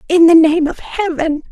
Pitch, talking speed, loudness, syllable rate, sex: 325 Hz, 200 wpm, -13 LUFS, 4.7 syllables/s, female